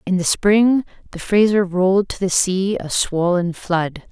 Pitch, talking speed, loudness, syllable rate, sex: 190 Hz, 175 wpm, -18 LUFS, 4.1 syllables/s, female